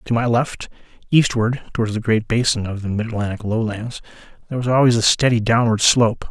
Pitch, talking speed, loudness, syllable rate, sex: 115 Hz, 190 wpm, -18 LUFS, 5.9 syllables/s, male